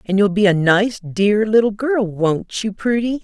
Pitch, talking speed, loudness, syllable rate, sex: 205 Hz, 205 wpm, -17 LUFS, 4.2 syllables/s, female